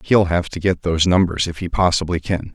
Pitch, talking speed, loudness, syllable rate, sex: 85 Hz, 235 wpm, -19 LUFS, 5.7 syllables/s, male